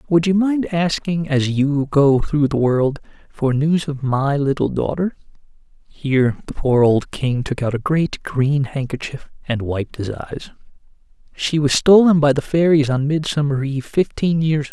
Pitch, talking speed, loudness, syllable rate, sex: 145 Hz, 175 wpm, -18 LUFS, 3.3 syllables/s, male